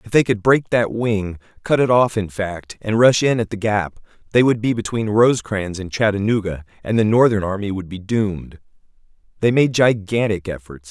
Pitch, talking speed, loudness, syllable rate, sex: 105 Hz, 195 wpm, -18 LUFS, 5.1 syllables/s, male